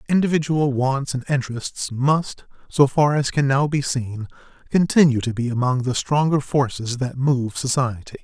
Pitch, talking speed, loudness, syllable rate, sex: 135 Hz, 160 wpm, -21 LUFS, 4.7 syllables/s, male